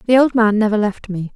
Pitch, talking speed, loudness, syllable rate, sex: 215 Hz, 265 wpm, -16 LUFS, 5.9 syllables/s, female